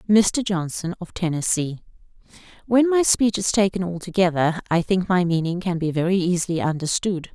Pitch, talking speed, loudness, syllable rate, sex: 180 Hz, 155 wpm, -21 LUFS, 5.2 syllables/s, female